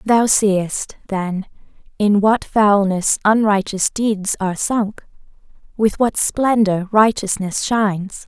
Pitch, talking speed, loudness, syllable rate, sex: 205 Hz, 110 wpm, -17 LUFS, 3.4 syllables/s, female